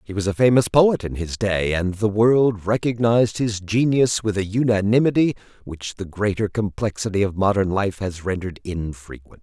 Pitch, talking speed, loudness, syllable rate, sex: 105 Hz, 170 wpm, -20 LUFS, 5.0 syllables/s, male